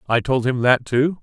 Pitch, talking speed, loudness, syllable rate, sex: 130 Hz, 245 wpm, -19 LUFS, 4.8 syllables/s, male